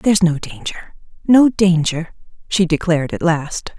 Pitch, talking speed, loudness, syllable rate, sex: 170 Hz, 125 wpm, -17 LUFS, 4.6 syllables/s, female